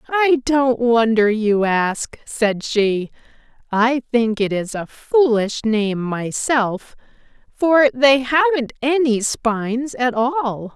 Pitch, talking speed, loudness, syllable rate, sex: 240 Hz, 125 wpm, -18 LUFS, 3.1 syllables/s, female